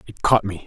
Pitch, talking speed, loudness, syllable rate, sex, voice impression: 100 Hz, 270 wpm, -20 LUFS, 5.9 syllables/s, male, masculine, adult-like, middle-aged, thick, tensed, powerful, very bright, slightly soft, clear, fluent, slightly raspy, cool, intellectual, slightly refreshing, sincere, slightly calm, mature, slightly friendly, slightly reassuring, slightly elegant, slightly sweet, lively, intense, slightly sharp